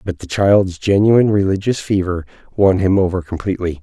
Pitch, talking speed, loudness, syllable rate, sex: 95 Hz, 155 wpm, -16 LUFS, 5.5 syllables/s, male